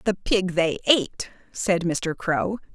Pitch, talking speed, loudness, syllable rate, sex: 185 Hz, 155 wpm, -23 LUFS, 3.9 syllables/s, female